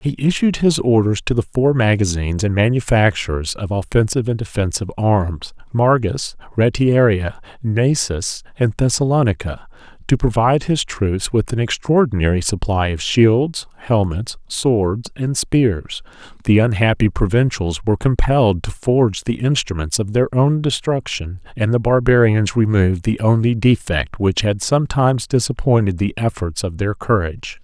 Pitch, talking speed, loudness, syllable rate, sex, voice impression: 110 Hz, 135 wpm, -17 LUFS, 4.8 syllables/s, male, very masculine, very middle-aged, very thick, slightly relaxed, very powerful, bright, very soft, very muffled, fluent, raspy, very cool, intellectual, slightly refreshing, sincere, very calm, very mature, very friendly, reassuring, very unique, slightly elegant, wild, sweet, lively, kind, modest